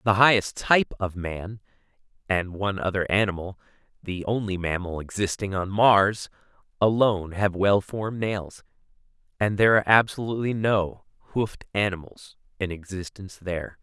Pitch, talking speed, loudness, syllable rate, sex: 100 Hz, 130 wpm, -24 LUFS, 5.2 syllables/s, male